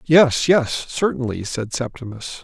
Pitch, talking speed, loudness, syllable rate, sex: 130 Hz, 125 wpm, -20 LUFS, 4.0 syllables/s, male